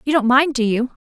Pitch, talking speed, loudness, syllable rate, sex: 255 Hz, 290 wpm, -17 LUFS, 5.8 syllables/s, female